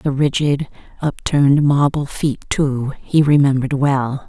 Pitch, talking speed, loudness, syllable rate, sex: 140 Hz, 125 wpm, -17 LUFS, 4.2 syllables/s, female